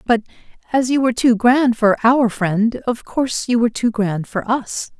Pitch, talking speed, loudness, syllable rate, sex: 235 Hz, 205 wpm, -17 LUFS, 4.7 syllables/s, female